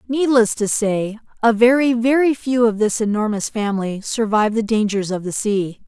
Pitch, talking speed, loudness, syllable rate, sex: 220 Hz, 175 wpm, -18 LUFS, 5.0 syllables/s, female